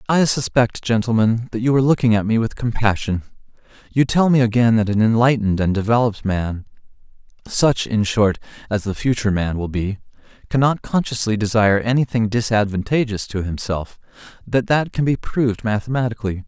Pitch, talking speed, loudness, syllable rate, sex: 115 Hz, 155 wpm, -19 LUFS, 5.7 syllables/s, male